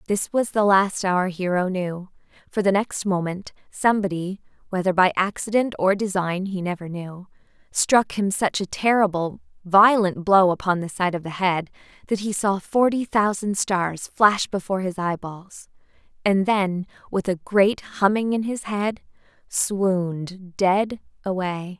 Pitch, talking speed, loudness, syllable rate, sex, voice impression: 190 Hz, 145 wpm, -22 LUFS, 4.2 syllables/s, female, very feminine, slightly young, slightly adult-like, thin, tensed, powerful, slightly dark, slightly hard, slightly muffled, fluent, slightly raspy, cute, slightly cool, slightly intellectual, very refreshing, slightly sincere, slightly calm, reassuring, very unique, slightly elegant, wild, sweet, kind, slightly intense, slightly sharp, light